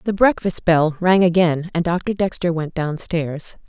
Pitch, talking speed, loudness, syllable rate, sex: 170 Hz, 165 wpm, -19 LUFS, 4.4 syllables/s, female